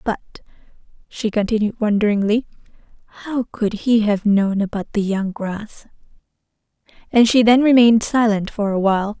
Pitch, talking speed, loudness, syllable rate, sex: 215 Hz, 125 wpm, -18 LUFS, 5.1 syllables/s, female